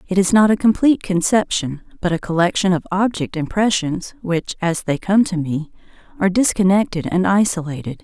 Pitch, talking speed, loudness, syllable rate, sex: 185 Hz, 165 wpm, -18 LUFS, 5.4 syllables/s, female